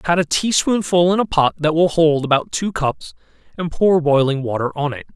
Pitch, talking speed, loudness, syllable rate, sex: 160 Hz, 220 wpm, -17 LUFS, 5.0 syllables/s, male